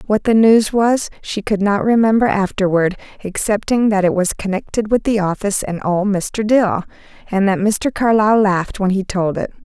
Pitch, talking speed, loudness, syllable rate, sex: 205 Hz, 185 wpm, -16 LUFS, 5.0 syllables/s, female